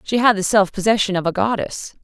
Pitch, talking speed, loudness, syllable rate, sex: 200 Hz, 235 wpm, -18 LUFS, 5.9 syllables/s, female